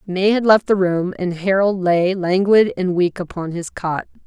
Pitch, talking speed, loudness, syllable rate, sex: 185 Hz, 195 wpm, -18 LUFS, 4.3 syllables/s, female